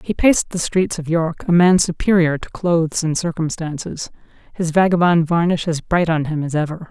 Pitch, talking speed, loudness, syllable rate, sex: 165 Hz, 185 wpm, -18 LUFS, 5.3 syllables/s, female